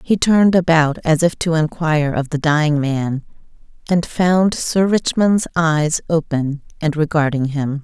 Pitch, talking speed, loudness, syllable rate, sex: 160 Hz, 155 wpm, -17 LUFS, 4.3 syllables/s, female